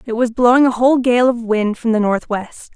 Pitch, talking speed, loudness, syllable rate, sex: 235 Hz, 240 wpm, -15 LUFS, 5.3 syllables/s, female